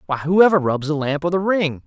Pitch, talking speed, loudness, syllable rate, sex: 155 Hz, 260 wpm, -18 LUFS, 5.3 syllables/s, male